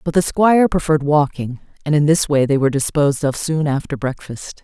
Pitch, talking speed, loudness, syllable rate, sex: 150 Hz, 205 wpm, -17 LUFS, 5.8 syllables/s, female